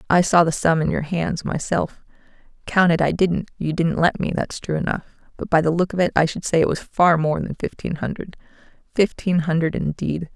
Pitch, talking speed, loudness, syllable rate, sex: 165 Hz, 210 wpm, -21 LUFS, 5.3 syllables/s, female